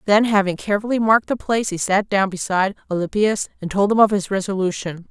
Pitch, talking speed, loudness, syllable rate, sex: 200 Hz, 200 wpm, -19 LUFS, 6.4 syllables/s, female